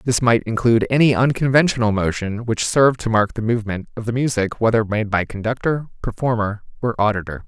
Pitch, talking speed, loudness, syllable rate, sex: 115 Hz, 175 wpm, -19 LUFS, 5.9 syllables/s, male